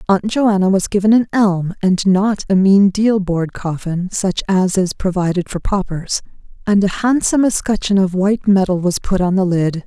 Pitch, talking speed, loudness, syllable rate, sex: 195 Hz, 190 wpm, -16 LUFS, 4.8 syllables/s, female